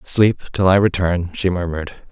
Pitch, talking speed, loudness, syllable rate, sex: 90 Hz, 170 wpm, -18 LUFS, 4.8 syllables/s, male